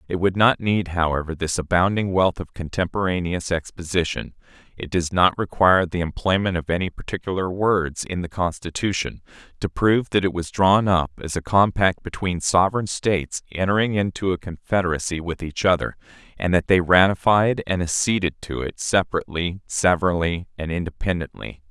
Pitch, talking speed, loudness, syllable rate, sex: 90 Hz, 150 wpm, -22 LUFS, 5.4 syllables/s, male